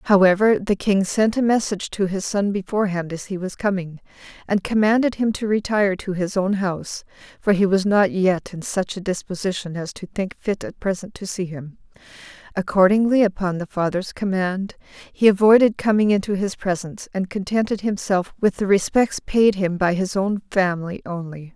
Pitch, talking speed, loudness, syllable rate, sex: 195 Hz, 180 wpm, -21 LUFS, 5.2 syllables/s, female